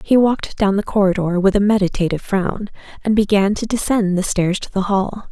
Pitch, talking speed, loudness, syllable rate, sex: 200 Hz, 205 wpm, -18 LUFS, 5.6 syllables/s, female